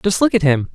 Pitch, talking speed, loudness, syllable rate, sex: 170 Hz, 325 wpm, -16 LUFS, 6.3 syllables/s, male